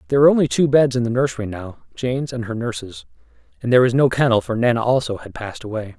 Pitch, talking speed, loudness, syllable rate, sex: 120 Hz, 240 wpm, -19 LUFS, 7.2 syllables/s, male